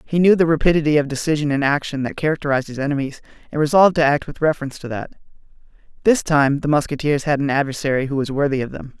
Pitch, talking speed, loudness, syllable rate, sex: 145 Hz, 215 wpm, -19 LUFS, 7.1 syllables/s, male